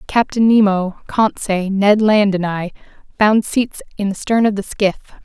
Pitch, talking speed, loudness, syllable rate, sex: 205 Hz, 170 wpm, -16 LUFS, 4.2 syllables/s, female